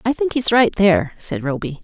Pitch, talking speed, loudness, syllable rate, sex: 205 Hz, 230 wpm, -17 LUFS, 5.3 syllables/s, female